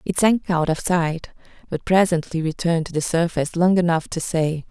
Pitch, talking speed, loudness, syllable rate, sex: 170 Hz, 190 wpm, -21 LUFS, 5.2 syllables/s, female